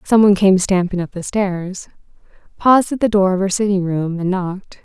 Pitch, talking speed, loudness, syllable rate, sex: 190 Hz, 185 wpm, -16 LUFS, 5.5 syllables/s, female